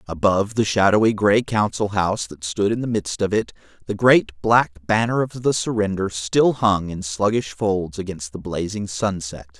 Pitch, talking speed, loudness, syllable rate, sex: 100 Hz, 180 wpm, -20 LUFS, 4.7 syllables/s, male